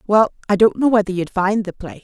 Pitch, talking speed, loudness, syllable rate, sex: 200 Hz, 265 wpm, -17 LUFS, 6.3 syllables/s, female